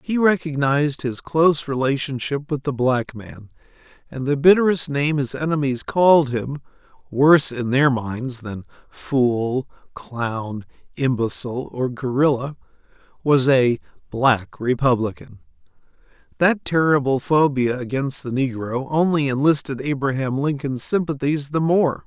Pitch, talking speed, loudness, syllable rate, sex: 135 Hz, 115 wpm, -20 LUFS, 4.3 syllables/s, male